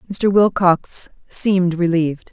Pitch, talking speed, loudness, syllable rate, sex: 180 Hz, 105 wpm, -17 LUFS, 4.0 syllables/s, female